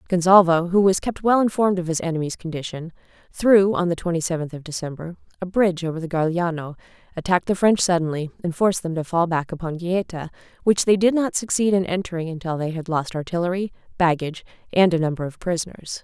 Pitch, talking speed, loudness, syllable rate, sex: 175 Hz, 195 wpm, -21 LUFS, 6.4 syllables/s, female